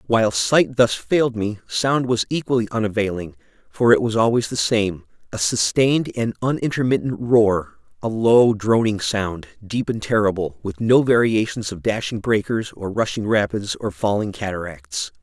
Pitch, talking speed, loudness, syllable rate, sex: 110 Hz, 150 wpm, -20 LUFS, 4.7 syllables/s, male